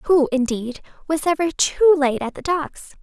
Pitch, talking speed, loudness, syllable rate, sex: 305 Hz, 180 wpm, -20 LUFS, 4.6 syllables/s, female